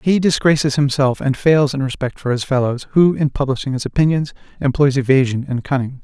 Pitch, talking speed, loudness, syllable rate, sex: 140 Hz, 190 wpm, -17 LUFS, 5.7 syllables/s, male